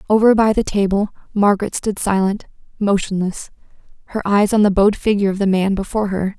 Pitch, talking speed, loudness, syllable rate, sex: 200 Hz, 180 wpm, -17 LUFS, 6.1 syllables/s, female